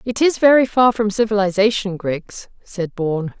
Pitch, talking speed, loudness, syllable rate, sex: 210 Hz, 160 wpm, -17 LUFS, 4.8 syllables/s, female